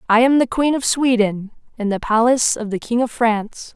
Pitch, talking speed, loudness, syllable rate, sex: 235 Hz, 225 wpm, -18 LUFS, 5.4 syllables/s, female